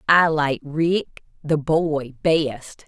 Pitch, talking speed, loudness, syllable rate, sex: 160 Hz, 125 wpm, -21 LUFS, 2.6 syllables/s, female